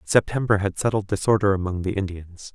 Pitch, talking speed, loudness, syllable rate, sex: 100 Hz, 165 wpm, -23 LUFS, 5.7 syllables/s, male